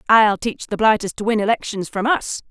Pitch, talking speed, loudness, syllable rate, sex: 215 Hz, 215 wpm, -19 LUFS, 5.3 syllables/s, female